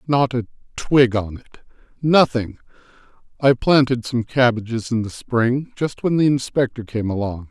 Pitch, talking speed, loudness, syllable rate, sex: 125 Hz, 145 wpm, -19 LUFS, 4.6 syllables/s, male